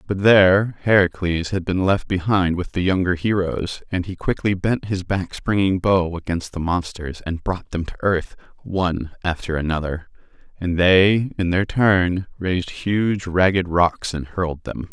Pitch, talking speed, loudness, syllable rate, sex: 90 Hz, 170 wpm, -20 LUFS, 4.4 syllables/s, male